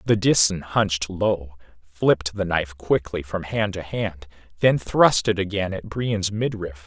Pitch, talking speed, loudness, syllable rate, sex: 95 Hz, 165 wpm, -22 LUFS, 4.2 syllables/s, male